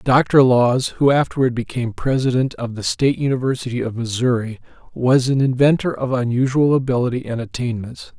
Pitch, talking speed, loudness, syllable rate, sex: 125 Hz, 145 wpm, -18 LUFS, 5.6 syllables/s, male